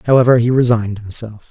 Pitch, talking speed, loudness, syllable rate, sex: 115 Hz, 160 wpm, -14 LUFS, 6.6 syllables/s, male